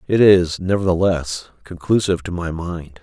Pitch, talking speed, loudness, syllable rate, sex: 90 Hz, 140 wpm, -18 LUFS, 4.7 syllables/s, male